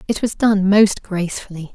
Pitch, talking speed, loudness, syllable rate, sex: 195 Hz, 170 wpm, -17 LUFS, 5.0 syllables/s, female